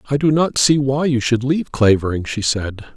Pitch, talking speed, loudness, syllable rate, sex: 130 Hz, 225 wpm, -17 LUFS, 5.2 syllables/s, male